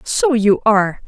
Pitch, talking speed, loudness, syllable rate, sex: 225 Hz, 170 wpm, -15 LUFS, 4.4 syllables/s, female